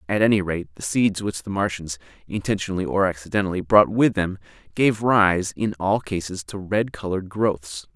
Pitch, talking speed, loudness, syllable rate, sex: 95 Hz, 175 wpm, -22 LUFS, 4.1 syllables/s, male